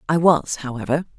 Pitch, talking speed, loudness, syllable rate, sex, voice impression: 150 Hz, 150 wpm, -20 LUFS, 5.8 syllables/s, female, very feminine, middle-aged, thin, very tensed, powerful, bright, soft, clear, fluent, slightly cute, cool, very intellectual, refreshing, sincere, very calm, friendly, reassuring, unique, elegant, wild, slightly sweet, lively, strict, slightly intense